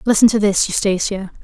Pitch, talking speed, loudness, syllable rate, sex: 200 Hz, 170 wpm, -16 LUFS, 5.7 syllables/s, female